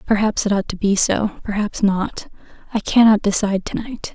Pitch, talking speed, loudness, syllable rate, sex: 205 Hz, 190 wpm, -18 LUFS, 5.2 syllables/s, female